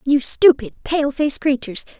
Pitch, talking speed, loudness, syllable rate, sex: 280 Hz, 150 wpm, -17 LUFS, 5.3 syllables/s, female